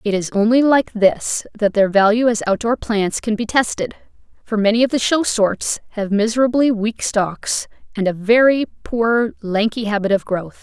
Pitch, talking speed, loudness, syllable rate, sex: 220 Hz, 180 wpm, -17 LUFS, 4.5 syllables/s, female